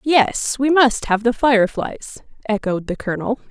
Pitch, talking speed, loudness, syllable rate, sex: 235 Hz, 155 wpm, -18 LUFS, 4.5 syllables/s, female